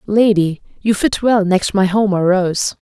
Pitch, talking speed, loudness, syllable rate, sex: 200 Hz, 165 wpm, -15 LUFS, 4.1 syllables/s, female